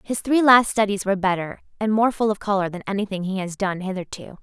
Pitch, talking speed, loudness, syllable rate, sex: 200 Hz, 230 wpm, -21 LUFS, 6.1 syllables/s, female